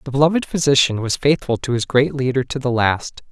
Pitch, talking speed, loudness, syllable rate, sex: 130 Hz, 215 wpm, -18 LUFS, 5.7 syllables/s, male